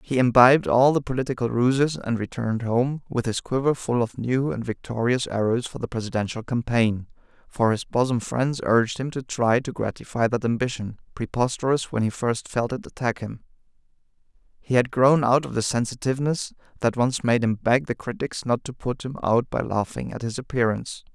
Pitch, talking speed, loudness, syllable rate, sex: 120 Hz, 185 wpm, -24 LUFS, 5.4 syllables/s, male